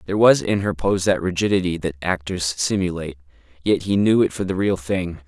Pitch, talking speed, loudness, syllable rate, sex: 90 Hz, 205 wpm, -20 LUFS, 5.7 syllables/s, male